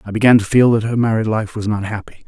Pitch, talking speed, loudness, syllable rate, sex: 110 Hz, 290 wpm, -16 LUFS, 6.8 syllables/s, male